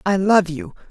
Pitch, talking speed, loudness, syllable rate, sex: 180 Hz, 200 wpm, -17 LUFS, 4.5 syllables/s, female